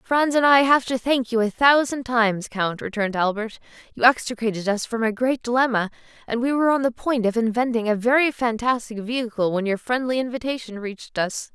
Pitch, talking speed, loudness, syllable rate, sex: 235 Hz, 200 wpm, -21 LUFS, 5.7 syllables/s, female